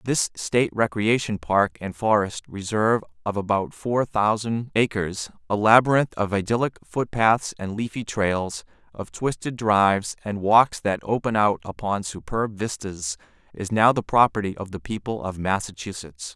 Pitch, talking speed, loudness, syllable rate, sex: 105 Hz, 145 wpm, -23 LUFS, 4.5 syllables/s, male